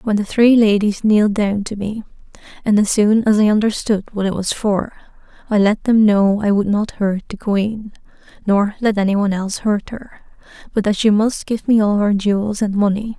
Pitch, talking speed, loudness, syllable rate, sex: 210 Hz, 210 wpm, -17 LUFS, 5.2 syllables/s, female